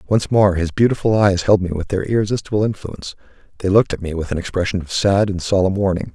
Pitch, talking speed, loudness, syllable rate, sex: 95 Hz, 225 wpm, -18 LUFS, 6.5 syllables/s, male